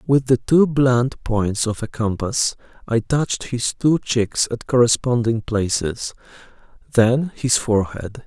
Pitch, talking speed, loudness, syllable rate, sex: 120 Hz, 140 wpm, -19 LUFS, 3.9 syllables/s, male